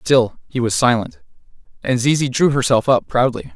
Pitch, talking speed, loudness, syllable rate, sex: 125 Hz, 170 wpm, -17 LUFS, 4.9 syllables/s, male